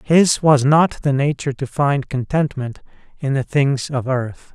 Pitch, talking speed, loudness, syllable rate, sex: 140 Hz, 170 wpm, -18 LUFS, 4.1 syllables/s, male